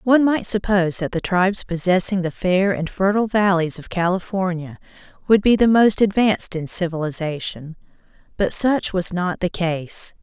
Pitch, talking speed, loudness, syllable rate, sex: 185 Hz, 160 wpm, -19 LUFS, 5.0 syllables/s, female